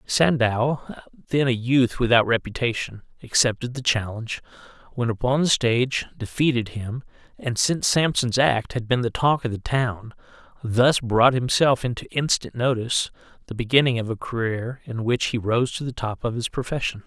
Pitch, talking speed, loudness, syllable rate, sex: 120 Hz, 165 wpm, -22 LUFS, 4.9 syllables/s, male